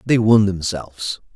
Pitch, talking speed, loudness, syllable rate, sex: 100 Hz, 135 wpm, -18 LUFS, 4.4 syllables/s, male